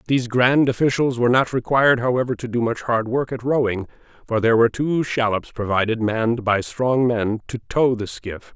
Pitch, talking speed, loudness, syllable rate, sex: 120 Hz, 195 wpm, -20 LUFS, 5.5 syllables/s, male